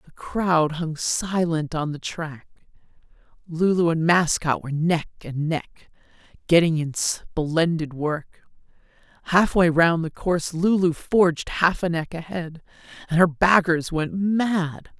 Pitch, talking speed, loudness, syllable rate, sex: 165 Hz, 140 wpm, -22 LUFS, 3.9 syllables/s, female